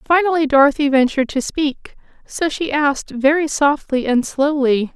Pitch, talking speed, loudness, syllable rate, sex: 285 Hz, 145 wpm, -17 LUFS, 5.0 syllables/s, female